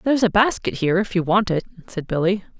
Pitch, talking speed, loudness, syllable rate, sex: 195 Hz, 230 wpm, -20 LUFS, 6.6 syllables/s, female